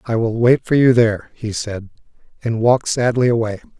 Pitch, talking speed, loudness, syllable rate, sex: 115 Hz, 190 wpm, -17 LUFS, 5.4 syllables/s, male